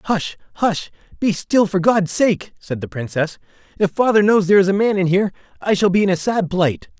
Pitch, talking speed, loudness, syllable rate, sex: 190 Hz, 225 wpm, -18 LUFS, 5.5 syllables/s, male